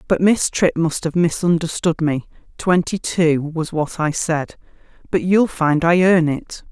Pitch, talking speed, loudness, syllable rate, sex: 165 Hz, 170 wpm, -18 LUFS, 4.0 syllables/s, female